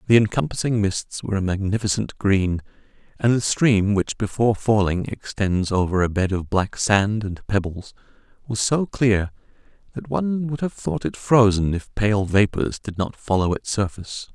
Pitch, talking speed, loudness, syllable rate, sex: 105 Hz, 165 wpm, -22 LUFS, 4.8 syllables/s, male